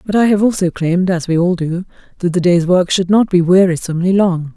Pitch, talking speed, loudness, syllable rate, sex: 180 Hz, 235 wpm, -14 LUFS, 5.9 syllables/s, female